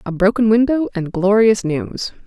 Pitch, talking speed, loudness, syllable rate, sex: 210 Hz, 160 wpm, -16 LUFS, 4.5 syllables/s, female